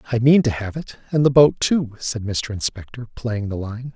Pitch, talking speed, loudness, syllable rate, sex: 120 Hz, 225 wpm, -20 LUFS, 4.9 syllables/s, male